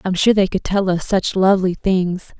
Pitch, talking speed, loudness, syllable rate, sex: 190 Hz, 225 wpm, -17 LUFS, 4.9 syllables/s, female